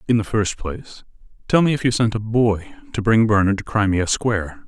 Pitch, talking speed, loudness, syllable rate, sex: 110 Hz, 220 wpm, -19 LUFS, 5.4 syllables/s, male